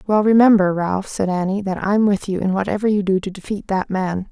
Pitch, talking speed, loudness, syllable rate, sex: 195 Hz, 235 wpm, -18 LUFS, 5.5 syllables/s, female